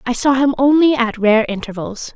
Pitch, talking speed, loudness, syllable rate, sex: 245 Hz, 195 wpm, -15 LUFS, 5.0 syllables/s, female